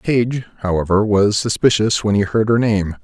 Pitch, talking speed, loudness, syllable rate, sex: 105 Hz, 200 wpm, -17 LUFS, 5.2 syllables/s, male